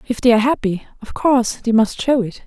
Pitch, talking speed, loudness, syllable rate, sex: 235 Hz, 245 wpm, -17 LUFS, 6.1 syllables/s, female